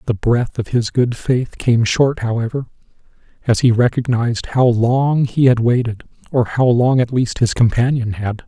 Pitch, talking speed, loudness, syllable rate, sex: 120 Hz, 175 wpm, -16 LUFS, 4.5 syllables/s, male